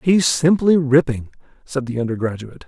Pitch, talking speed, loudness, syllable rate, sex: 140 Hz, 135 wpm, -18 LUFS, 5.4 syllables/s, male